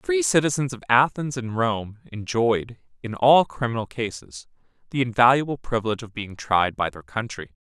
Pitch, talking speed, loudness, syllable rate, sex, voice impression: 115 Hz, 165 wpm, -23 LUFS, 5.2 syllables/s, male, masculine, adult-like, fluent, cool, slightly refreshing, sincere, slightly sweet